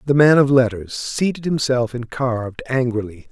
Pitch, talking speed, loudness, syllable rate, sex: 125 Hz, 165 wpm, -19 LUFS, 4.8 syllables/s, male